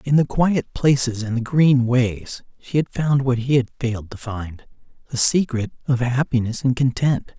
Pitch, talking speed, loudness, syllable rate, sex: 130 Hz, 180 wpm, -20 LUFS, 4.6 syllables/s, male